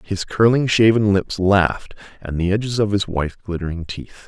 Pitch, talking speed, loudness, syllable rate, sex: 100 Hz, 185 wpm, -19 LUFS, 5.1 syllables/s, male